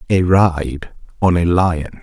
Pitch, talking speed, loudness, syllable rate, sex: 85 Hz, 150 wpm, -16 LUFS, 3.2 syllables/s, male